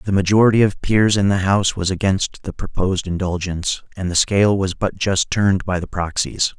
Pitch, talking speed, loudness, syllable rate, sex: 95 Hz, 200 wpm, -18 LUFS, 5.6 syllables/s, male